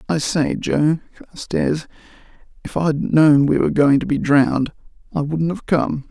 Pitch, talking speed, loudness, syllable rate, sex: 155 Hz, 165 wpm, -18 LUFS, 4.5 syllables/s, male